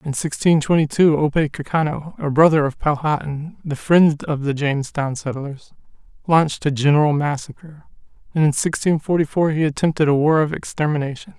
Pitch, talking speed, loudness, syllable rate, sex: 150 Hz, 160 wpm, -19 LUFS, 5.4 syllables/s, male